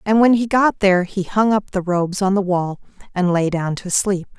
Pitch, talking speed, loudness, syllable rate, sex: 190 Hz, 245 wpm, -18 LUFS, 5.2 syllables/s, female